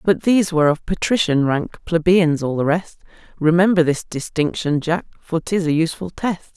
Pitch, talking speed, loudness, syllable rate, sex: 165 Hz, 175 wpm, -19 LUFS, 5.1 syllables/s, female